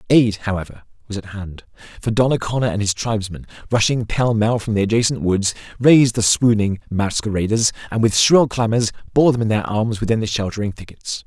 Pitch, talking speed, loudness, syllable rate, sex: 110 Hz, 180 wpm, -18 LUFS, 5.7 syllables/s, male